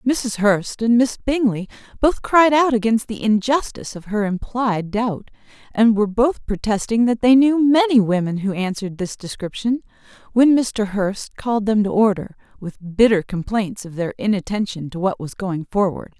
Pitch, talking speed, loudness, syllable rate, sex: 215 Hz, 170 wpm, -19 LUFS, 4.8 syllables/s, female